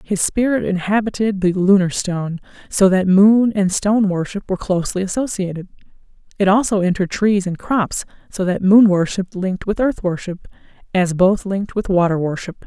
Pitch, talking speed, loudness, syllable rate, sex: 195 Hz, 165 wpm, -17 LUFS, 5.4 syllables/s, female